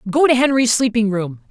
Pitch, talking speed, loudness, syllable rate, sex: 230 Hz, 200 wpm, -16 LUFS, 5.5 syllables/s, female